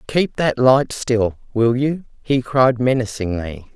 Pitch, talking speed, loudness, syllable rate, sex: 125 Hz, 145 wpm, -18 LUFS, 3.7 syllables/s, female